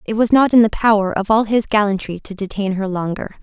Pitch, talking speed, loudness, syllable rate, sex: 210 Hz, 245 wpm, -17 LUFS, 5.8 syllables/s, female